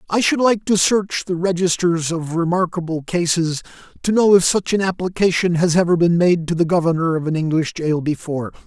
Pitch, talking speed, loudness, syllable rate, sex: 175 Hz, 195 wpm, -18 LUFS, 5.4 syllables/s, male